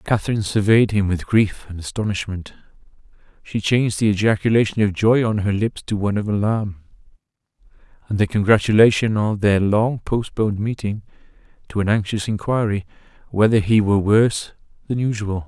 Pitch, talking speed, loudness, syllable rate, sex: 105 Hz, 145 wpm, -19 LUFS, 5.6 syllables/s, male